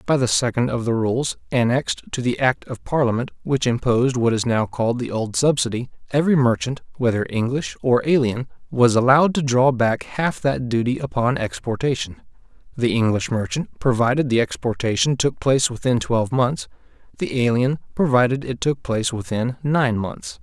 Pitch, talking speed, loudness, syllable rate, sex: 125 Hz, 165 wpm, -20 LUFS, 5.3 syllables/s, male